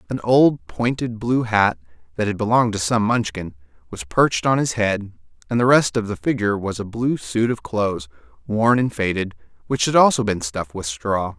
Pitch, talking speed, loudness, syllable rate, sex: 105 Hz, 200 wpm, -20 LUFS, 5.2 syllables/s, male